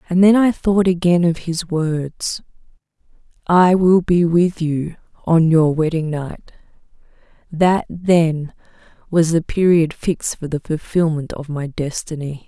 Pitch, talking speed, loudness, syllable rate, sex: 165 Hz, 135 wpm, -17 LUFS, 3.9 syllables/s, female